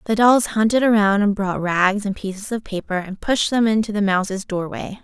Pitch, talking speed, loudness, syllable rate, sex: 205 Hz, 215 wpm, -19 LUFS, 5.1 syllables/s, female